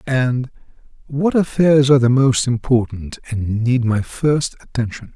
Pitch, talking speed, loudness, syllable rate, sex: 125 Hz, 140 wpm, -17 LUFS, 4.2 syllables/s, male